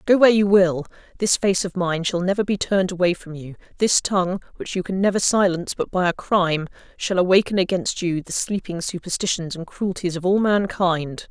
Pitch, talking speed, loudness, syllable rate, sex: 185 Hz, 200 wpm, -21 LUFS, 5.5 syllables/s, female